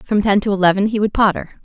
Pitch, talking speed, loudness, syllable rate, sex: 200 Hz, 255 wpm, -16 LUFS, 6.5 syllables/s, female